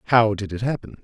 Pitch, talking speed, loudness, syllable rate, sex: 110 Hz, 230 wpm, -22 LUFS, 6.6 syllables/s, male